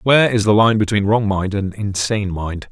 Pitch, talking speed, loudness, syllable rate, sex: 105 Hz, 220 wpm, -17 LUFS, 5.2 syllables/s, male